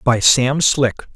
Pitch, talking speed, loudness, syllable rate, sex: 130 Hz, 155 wpm, -15 LUFS, 3.5 syllables/s, male